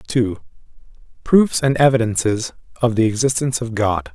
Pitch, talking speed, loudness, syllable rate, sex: 120 Hz, 130 wpm, -18 LUFS, 5.1 syllables/s, male